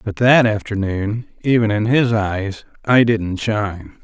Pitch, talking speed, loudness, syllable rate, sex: 105 Hz, 150 wpm, -17 LUFS, 4.0 syllables/s, male